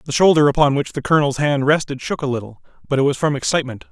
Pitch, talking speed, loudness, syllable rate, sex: 140 Hz, 245 wpm, -18 LUFS, 7.2 syllables/s, male